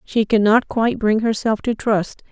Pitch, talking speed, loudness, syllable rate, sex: 220 Hz, 205 wpm, -18 LUFS, 5.1 syllables/s, female